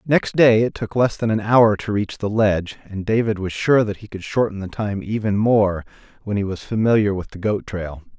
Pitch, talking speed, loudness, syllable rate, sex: 105 Hz, 235 wpm, -20 LUFS, 5.1 syllables/s, male